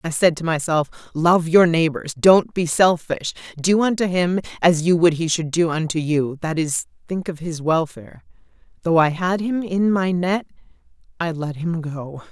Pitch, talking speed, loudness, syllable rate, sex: 170 Hz, 180 wpm, -20 LUFS, 4.6 syllables/s, female